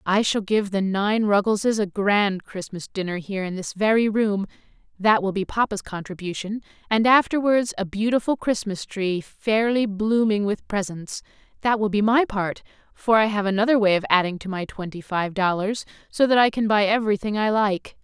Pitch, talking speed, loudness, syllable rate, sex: 205 Hz, 175 wpm, -22 LUFS, 5.1 syllables/s, female